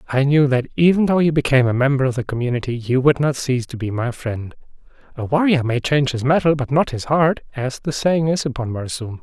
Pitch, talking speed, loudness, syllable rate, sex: 135 Hz, 235 wpm, -19 LUFS, 6.0 syllables/s, male